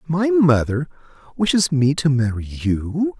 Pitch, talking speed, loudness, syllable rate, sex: 130 Hz, 130 wpm, -19 LUFS, 3.9 syllables/s, male